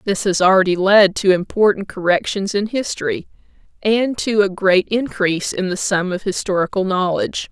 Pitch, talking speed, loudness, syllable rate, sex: 195 Hz, 160 wpm, -17 LUFS, 5.1 syllables/s, female